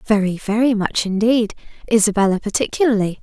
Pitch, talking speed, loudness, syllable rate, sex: 215 Hz, 110 wpm, -18 LUFS, 5.8 syllables/s, female